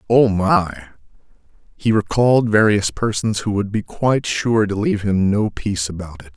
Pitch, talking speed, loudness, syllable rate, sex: 105 Hz, 170 wpm, -18 LUFS, 5.0 syllables/s, male